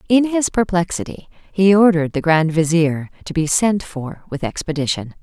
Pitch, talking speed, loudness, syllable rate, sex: 175 Hz, 160 wpm, -18 LUFS, 5.0 syllables/s, female